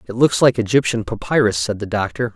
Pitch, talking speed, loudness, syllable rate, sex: 115 Hz, 205 wpm, -18 LUFS, 6.0 syllables/s, male